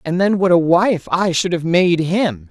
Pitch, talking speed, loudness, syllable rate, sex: 180 Hz, 240 wpm, -16 LUFS, 4.2 syllables/s, female